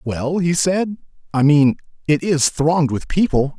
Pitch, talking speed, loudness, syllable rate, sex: 155 Hz, 165 wpm, -18 LUFS, 4.3 syllables/s, male